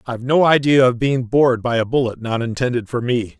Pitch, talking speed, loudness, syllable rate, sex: 125 Hz, 230 wpm, -17 LUFS, 5.8 syllables/s, male